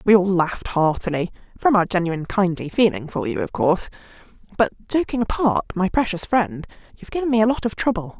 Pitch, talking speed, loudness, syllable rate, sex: 200 Hz, 185 wpm, -21 LUFS, 6.1 syllables/s, female